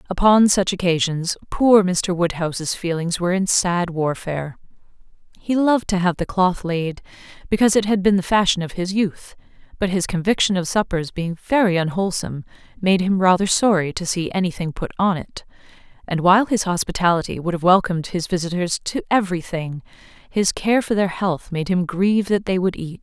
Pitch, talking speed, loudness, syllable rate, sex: 180 Hz, 180 wpm, -20 LUFS, 5.5 syllables/s, female